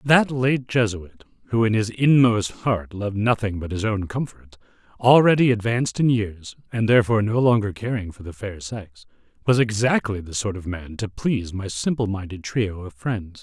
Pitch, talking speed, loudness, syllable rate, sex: 110 Hz, 180 wpm, -22 LUFS, 5.0 syllables/s, male